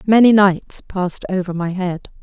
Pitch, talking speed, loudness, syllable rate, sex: 190 Hz, 160 wpm, -17 LUFS, 4.5 syllables/s, female